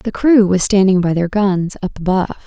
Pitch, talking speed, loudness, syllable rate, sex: 190 Hz, 220 wpm, -15 LUFS, 5.2 syllables/s, female